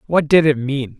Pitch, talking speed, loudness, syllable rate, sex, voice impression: 145 Hz, 240 wpm, -16 LUFS, 4.8 syllables/s, male, very masculine, very adult-like, slightly old, thick, slightly relaxed, slightly powerful, slightly dark, hard, slightly muffled, slightly halting, slightly raspy, slightly cool, intellectual, sincere, slightly calm, mature, slightly friendly, slightly reassuring, slightly unique, elegant, slightly wild, kind, modest